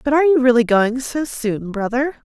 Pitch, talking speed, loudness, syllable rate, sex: 255 Hz, 210 wpm, -17 LUFS, 5.1 syllables/s, female